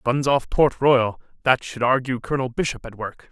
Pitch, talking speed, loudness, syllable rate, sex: 130 Hz, 200 wpm, -21 LUFS, 5.1 syllables/s, male